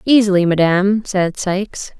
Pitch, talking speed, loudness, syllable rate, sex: 195 Hz, 120 wpm, -16 LUFS, 4.4 syllables/s, female